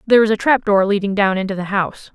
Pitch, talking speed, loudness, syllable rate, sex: 205 Hz, 280 wpm, -17 LUFS, 7.1 syllables/s, female